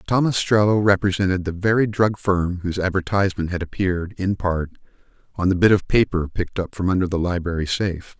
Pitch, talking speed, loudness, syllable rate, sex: 95 Hz, 185 wpm, -21 LUFS, 6.0 syllables/s, male